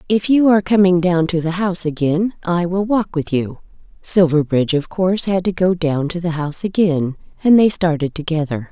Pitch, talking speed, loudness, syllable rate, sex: 175 Hz, 200 wpm, -17 LUFS, 5.4 syllables/s, female